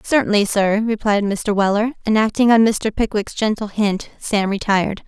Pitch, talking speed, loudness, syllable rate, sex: 210 Hz, 165 wpm, -18 LUFS, 4.7 syllables/s, female